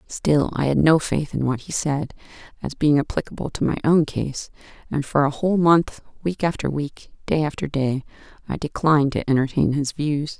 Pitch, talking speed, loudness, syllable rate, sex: 145 Hz, 190 wpm, -22 LUFS, 5.0 syllables/s, female